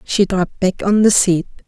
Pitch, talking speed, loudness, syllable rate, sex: 190 Hz, 215 wpm, -15 LUFS, 5.0 syllables/s, female